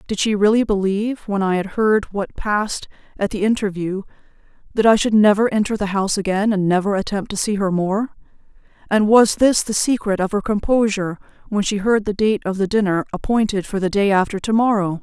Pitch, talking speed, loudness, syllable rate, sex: 205 Hz, 205 wpm, -19 LUFS, 5.6 syllables/s, female